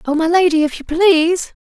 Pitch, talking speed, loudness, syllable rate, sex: 330 Hz, 220 wpm, -14 LUFS, 5.6 syllables/s, female